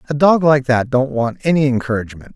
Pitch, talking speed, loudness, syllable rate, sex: 135 Hz, 205 wpm, -16 LUFS, 6.0 syllables/s, male